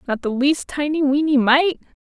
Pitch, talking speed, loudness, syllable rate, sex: 280 Hz, 180 wpm, -18 LUFS, 4.7 syllables/s, female